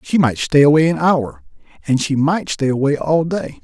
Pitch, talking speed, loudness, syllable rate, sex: 145 Hz, 215 wpm, -16 LUFS, 4.9 syllables/s, male